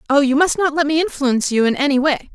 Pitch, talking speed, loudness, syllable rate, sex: 285 Hz, 280 wpm, -17 LUFS, 6.5 syllables/s, female